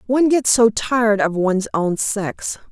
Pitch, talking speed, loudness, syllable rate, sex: 220 Hz, 175 wpm, -18 LUFS, 4.6 syllables/s, female